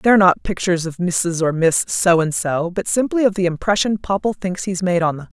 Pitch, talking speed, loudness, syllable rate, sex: 185 Hz, 235 wpm, -18 LUFS, 5.3 syllables/s, female